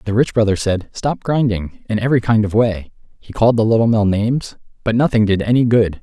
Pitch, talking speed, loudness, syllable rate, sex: 110 Hz, 220 wpm, -16 LUFS, 5.9 syllables/s, male